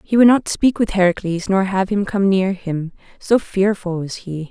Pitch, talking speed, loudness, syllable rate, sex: 195 Hz, 215 wpm, -18 LUFS, 4.6 syllables/s, female